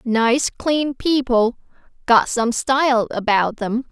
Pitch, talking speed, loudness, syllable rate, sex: 245 Hz, 125 wpm, -18 LUFS, 3.4 syllables/s, female